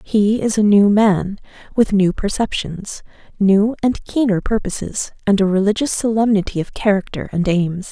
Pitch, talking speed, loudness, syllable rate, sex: 205 Hz, 150 wpm, -17 LUFS, 4.7 syllables/s, female